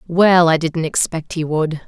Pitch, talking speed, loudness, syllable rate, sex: 165 Hz, 190 wpm, -16 LUFS, 4.2 syllables/s, female